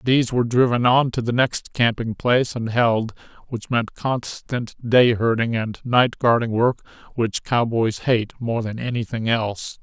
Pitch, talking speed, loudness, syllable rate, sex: 120 Hz, 165 wpm, -21 LUFS, 4.4 syllables/s, male